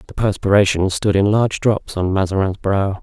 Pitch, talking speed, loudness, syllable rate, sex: 100 Hz, 180 wpm, -17 LUFS, 5.3 syllables/s, male